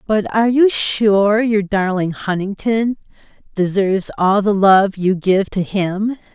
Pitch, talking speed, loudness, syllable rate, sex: 200 Hz, 140 wpm, -16 LUFS, 3.9 syllables/s, female